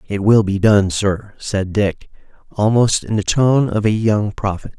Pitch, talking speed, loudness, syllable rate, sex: 105 Hz, 190 wpm, -16 LUFS, 4.1 syllables/s, male